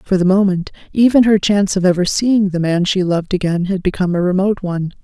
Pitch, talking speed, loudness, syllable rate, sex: 190 Hz, 225 wpm, -15 LUFS, 6.5 syllables/s, female